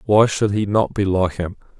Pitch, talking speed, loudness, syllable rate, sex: 100 Hz, 235 wpm, -19 LUFS, 4.8 syllables/s, male